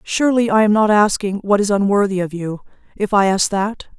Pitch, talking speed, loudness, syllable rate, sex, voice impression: 205 Hz, 210 wpm, -16 LUFS, 5.6 syllables/s, female, feminine, slightly adult-like, sincere, friendly, sweet